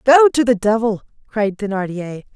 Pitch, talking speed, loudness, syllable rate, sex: 220 Hz, 155 wpm, -17 LUFS, 4.7 syllables/s, female